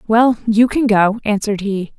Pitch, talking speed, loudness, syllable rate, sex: 215 Hz, 180 wpm, -15 LUFS, 4.8 syllables/s, female